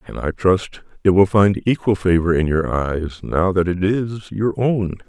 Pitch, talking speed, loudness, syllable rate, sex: 95 Hz, 200 wpm, -18 LUFS, 4.1 syllables/s, male